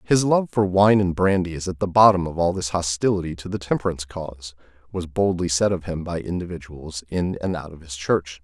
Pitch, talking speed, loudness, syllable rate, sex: 90 Hz, 220 wpm, -22 LUFS, 5.6 syllables/s, male